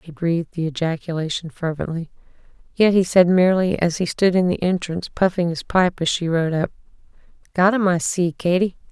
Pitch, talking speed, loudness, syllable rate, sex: 175 Hz, 180 wpm, -20 LUFS, 5.6 syllables/s, female